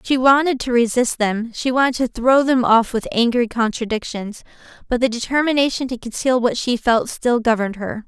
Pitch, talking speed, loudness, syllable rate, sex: 240 Hz, 170 wpm, -18 LUFS, 5.3 syllables/s, female